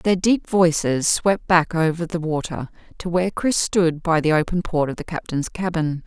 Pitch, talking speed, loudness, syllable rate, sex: 170 Hz, 200 wpm, -21 LUFS, 4.7 syllables/s, female